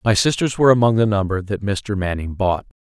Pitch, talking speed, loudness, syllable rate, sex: 105 Hz, 215 wpm, -19 LUFS, 5.8 syllables/s, male